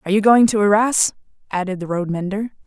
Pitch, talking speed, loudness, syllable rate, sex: 200 Hz, 200 wpm, -18 LUFS, 6.3 syllables/s, female